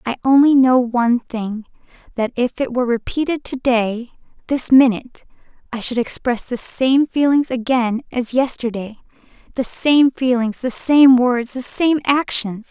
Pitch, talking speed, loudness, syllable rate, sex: 250 Hz, 145 wpm, -17 LUFS, 4.4 syllables/s, female